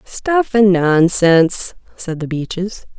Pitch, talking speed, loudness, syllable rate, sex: 190 Hz, 120 wpm, -15 LUFS, 3.5 syllables/s, female